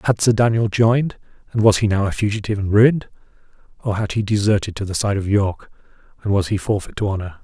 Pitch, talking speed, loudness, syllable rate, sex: 105 Hz, 220 wpm, -19 LUFS, 6.6 syllables/s, male